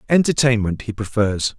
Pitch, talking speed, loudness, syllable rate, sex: 115 Hz, 115 wpm, -19 LUFS, 5.0 syllables/s, male